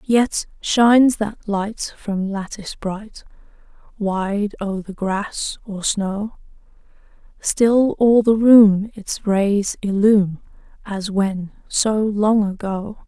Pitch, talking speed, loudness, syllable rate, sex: 205 Hz, 115 wpm, -19 LUFS, 3.2 syllables/s, female